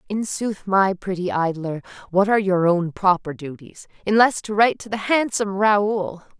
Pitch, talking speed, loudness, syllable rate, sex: 195 Hz, 170 wpm, -20 LUFS, 4.8 syllables/s, female